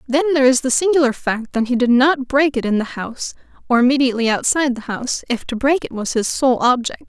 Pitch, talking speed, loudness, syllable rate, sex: 255 Hz, 235 wpm, -17 LUFS, 6.3 syllables/s, female